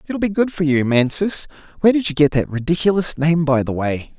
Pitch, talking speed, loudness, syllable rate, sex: 160 Hz, 230 wpm, -18 LUFS, 5.9 syllables/s, male